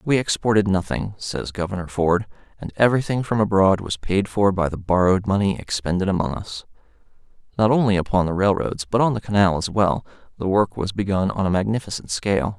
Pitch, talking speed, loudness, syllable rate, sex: 100 Hz, 185 wpm, -21 LUFS, 5.8 syllables/s, male